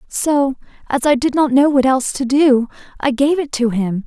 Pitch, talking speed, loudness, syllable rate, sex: 265 Hz, 220 wpm, -16 LUFS, 4.9 syllables/s, female